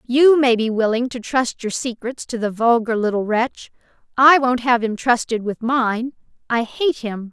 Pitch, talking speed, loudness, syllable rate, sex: 240 Hz, 190 wpm, -18 LUFS, 4.4 syllables/s, female